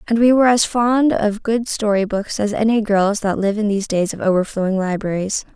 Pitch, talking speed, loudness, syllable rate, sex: 210 Hz, 215 wpm, -18 LUFS, 5.5 syllables/s, female